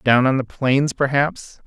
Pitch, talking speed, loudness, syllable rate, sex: 135 Hz, 180 wpm, -19 LUFS, 3.8 syllables/s, male